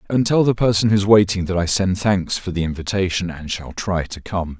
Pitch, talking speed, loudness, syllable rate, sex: 95 Hz, 250 wpm, -19 LUFS, 5.5 syllables/s, male